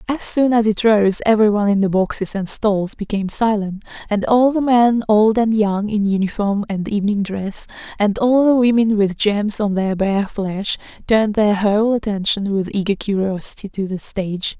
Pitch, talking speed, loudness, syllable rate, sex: 210 Hz, 185 wpm, -18 LUFS, 4.9 syllables/s, female